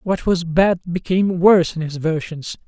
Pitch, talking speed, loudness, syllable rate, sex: 175 Hz, 180 wpm, -18 LUFS, 4.9 syllables/s, male